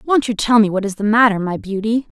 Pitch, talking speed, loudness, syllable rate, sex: 220 Hz, 275 wpm, -16 LUFS, 6.0 syllables/s, female